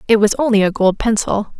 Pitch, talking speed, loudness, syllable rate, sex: 210 Hz, 225 wpm, -15 LUFS, 5.6 syllables/s, female